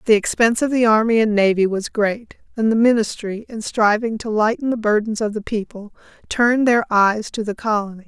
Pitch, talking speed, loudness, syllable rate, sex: 220 Hz, 200 wpm, -18 LUFS, 5.5 syllables/s, female